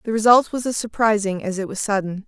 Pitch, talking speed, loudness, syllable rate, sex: 210 Hz, 235 wpm, -20 LUFS, 6.1 syllables/s, female